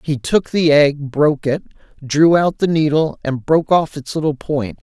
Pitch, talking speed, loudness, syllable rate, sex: 150 Hz, 195 wpm, -16 LUFS, 4.7 syllables/s, male